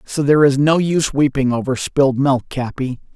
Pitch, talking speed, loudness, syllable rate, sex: 140 Hz, 190 wpm, -17 LUFS, 5.5 syllables/s, male